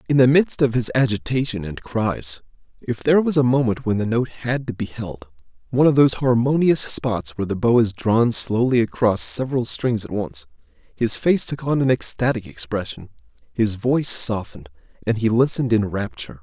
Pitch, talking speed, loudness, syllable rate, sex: 115 Hz, 185 wpm, -20 LUFS, 5.3 syllables/s, male